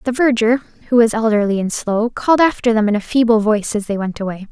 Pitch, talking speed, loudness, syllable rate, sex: 225 Hz, 240 wpm, -16 LUFS, 6.4 syllables/s, female